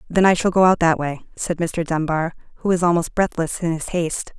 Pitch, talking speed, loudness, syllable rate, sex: 170 Hz, 235 wpm, -20 LUFS, 5.7 syllables/s, female